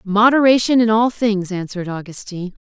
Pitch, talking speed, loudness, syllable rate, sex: 210 Hz, 135 wpm, -16 LUFS, 5.7 syllables/s, female